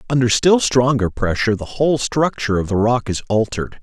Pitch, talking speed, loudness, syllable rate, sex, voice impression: 120 Hz, 190 wpm, -17 LUFS, 5.8 syllables/s, male, very masculine, very adult-like, slightly middle-aged, very thick, very tensed, powerful, bright, soft, slightly muffled, fluent, very cool, intellectual, sincere, very calm, very mature, friendly, elegant, slightly wild, lively, kind, intense